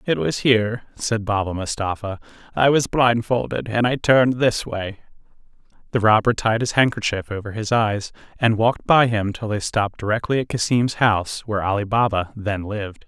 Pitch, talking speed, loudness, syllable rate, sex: 110 Hz, 175 wpm, -20 LUFS, 5.2 syllables/s, male